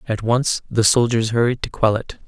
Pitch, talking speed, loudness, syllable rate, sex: 115 Hz, 210 wpm, -19 LUFS, 4.9 syllables/s, male